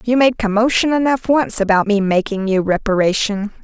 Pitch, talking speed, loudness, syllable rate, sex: 220 Hz, 165 wpm, -16 LUFS, 5.2 syllables/s, female